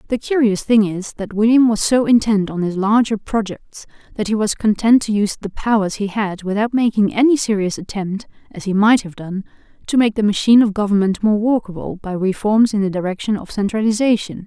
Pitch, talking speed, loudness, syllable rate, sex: 210 Hz, 200 wpm, -17 LUFS, 5.6 syllables/s, female